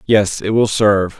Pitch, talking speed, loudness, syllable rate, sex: 105 Hz, 200 wpm, -15 LUFS, 4.8 syllables/s, male